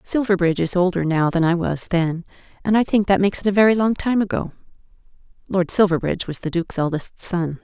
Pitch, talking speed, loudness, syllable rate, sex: 185 Hz, 205 wpm, -20 LUFS, 6.2 syllables/s, female